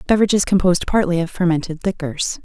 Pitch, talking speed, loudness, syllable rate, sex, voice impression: 180 Hz, 150 wpm, -18 LUFS, 6.6 syllables/s, female, feminine, adult-like, slightly soft, sincere, slightly calm, slightly friendly